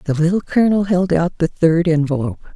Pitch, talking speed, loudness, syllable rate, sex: 170 Hz, 190 wpm, -17 LUFS, 6.2 syllables/s, female